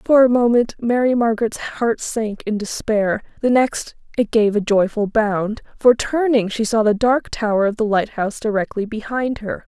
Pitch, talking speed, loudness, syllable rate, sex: 225 Hz, 180 wpm, -19 LUFS, 4.7 syllables/s, female